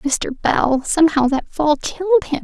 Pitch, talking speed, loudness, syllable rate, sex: 295 Hz, 175 wpm, -17 LUFS, 4.2 syllables/s, female